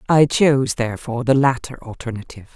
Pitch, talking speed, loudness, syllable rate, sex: 130 Hz, 140 wpm, -18 LUFS, 6.4 syllables/s, female